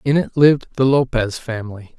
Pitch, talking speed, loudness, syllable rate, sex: 125 Hz, 180 wpm, -17 LUFS, 5.6 syllables/s, male